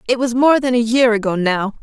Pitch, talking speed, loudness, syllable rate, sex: 235 Hz, 265 wpm, -15 LUFS, 5.6 syllables/s, female